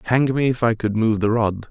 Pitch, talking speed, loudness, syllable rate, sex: 115 Hz, 280 wpm, -20 LUFS, 5.4 syllables/s, male